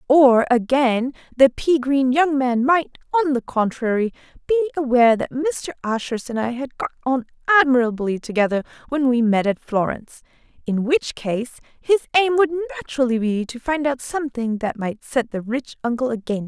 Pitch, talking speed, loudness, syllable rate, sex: 260 Hz, 175 wpm, -20 LUFS, 5.2 syllables/s, female